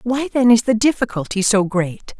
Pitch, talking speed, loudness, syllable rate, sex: 220 Hz, 190 wpm, -17 LUFS, 4.9 syllables/s, female